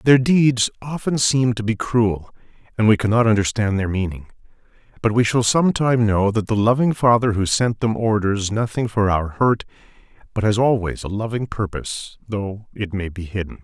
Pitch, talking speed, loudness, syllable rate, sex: 110 Hz, 185 wpm, -19 LUFS, 4.9 syllables/s, male